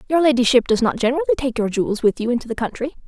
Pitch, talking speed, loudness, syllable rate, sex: 255 Hz, 255 wpm, -19 LUFS, 7.9 syllables/s, female